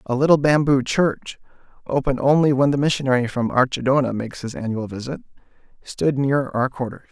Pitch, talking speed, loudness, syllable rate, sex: 135 Hz, 160 wpm, -20 LUFS, 5.6 syllables/s, male